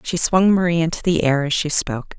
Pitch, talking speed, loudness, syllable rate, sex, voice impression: 165 Hz, 245 wpm, -18 LUFS, 5.7 syllables/s, female, feminine, slightly adult-like, slightly weak, soft, slightly muffled, cute, friendly, sweet